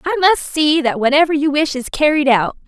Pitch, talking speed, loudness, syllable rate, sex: 295 Hz, 225 wpm, -15 LUFS, 5.4 syllables/s, female